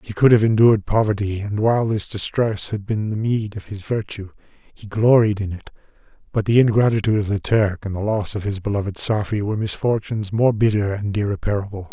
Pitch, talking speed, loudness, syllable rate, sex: 105 Hz, 195 wpm, -20 LUFS, 5.8 syllables/s, male